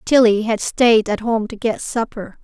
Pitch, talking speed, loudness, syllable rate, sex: 220 Hz, 195 wpm, -18 LUFS, 4.3 syllables/s, female